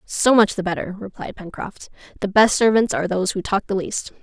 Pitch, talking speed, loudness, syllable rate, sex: 200 Hz, 215 wpm, -19 LUFS, 5.7 syllables/s, female